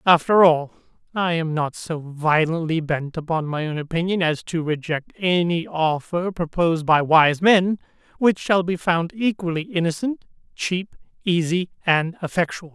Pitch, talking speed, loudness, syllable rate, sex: 170 Hz, 145 wpm, -21 LUFS, 4.5 syllables/s, male